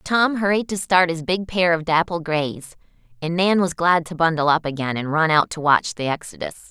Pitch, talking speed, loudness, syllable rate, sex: 165 Hz, 225 wpm, -20 LUFS, 5.0 syllables/s, female